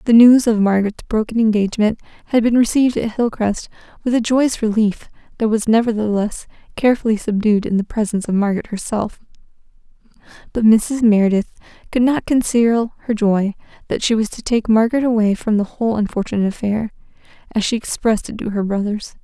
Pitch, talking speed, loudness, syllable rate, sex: 220 Hz, 165 wpm, -17 LUFS, 6.0 syllables/s, female